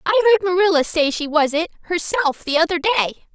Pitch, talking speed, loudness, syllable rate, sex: 335 Hz, 195 wpm, -18 LUFS, 5.9 syllables/s, female